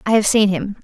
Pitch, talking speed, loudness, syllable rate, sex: 205 Hz, 285 wpm, -16 LUFS, 6.0 syllables/s, female